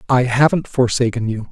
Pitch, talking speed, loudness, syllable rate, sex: 125 Hz, 160 wpm, -17 LUFS, 5.3 syllables/s, male